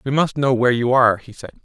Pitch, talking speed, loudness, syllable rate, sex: 125 Hz, 295 wpm, -17 LUFS, 6.9 syllables/s, male